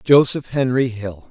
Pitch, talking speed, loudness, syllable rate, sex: 125 Hz, 140 wpm, -18 LUFS, 4.1 syllables/s, male